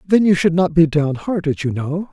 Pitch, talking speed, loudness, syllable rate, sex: 165 Hz, 225 wpm, -17 LUFS, 5.0 syllables/s, male